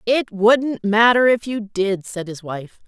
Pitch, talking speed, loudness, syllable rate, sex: 215 Hz, 190 wpm, -18 LUFS, 3.7 syllables/s, female